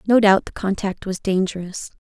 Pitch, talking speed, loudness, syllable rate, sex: 195 Hz, 180 wpm, -21 LUFS, 5.1 syllables/s, female